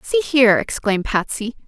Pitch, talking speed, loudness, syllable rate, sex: 210 Hz, 145 wpm, -18 LUFS, 5.4 syllables/s, female